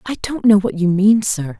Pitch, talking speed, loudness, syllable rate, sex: 200 Hz, 265 wpm, -15 LUFS, 4.9 syllables/s, female